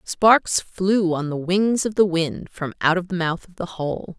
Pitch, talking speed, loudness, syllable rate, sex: 180 Hz, 230 wpm, -21 LUFS, 4.0 syllables/s, female